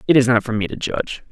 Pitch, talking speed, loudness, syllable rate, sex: 120 Hz, 320 wpm, -19 LUFS, 7.3 syllables/s, male